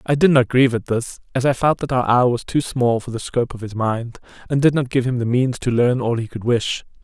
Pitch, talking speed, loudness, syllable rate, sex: 125 Hz, 290 wpm, -19 LUFS, 5.9 syllables/s, male